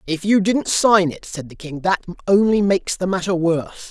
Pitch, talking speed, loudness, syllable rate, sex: 185 Hz, 215 wpm, -18 LUFS, 5.3 syllables/s, male